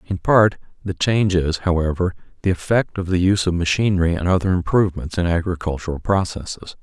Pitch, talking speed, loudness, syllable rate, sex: 90 Hz, 165 wpm, -20 LUFS, 6.1 syllables/s, male